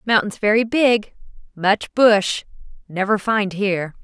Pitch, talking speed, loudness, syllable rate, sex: 210 Hz, 120 wpm, -18 LUFS, 3.9 syllables/s, female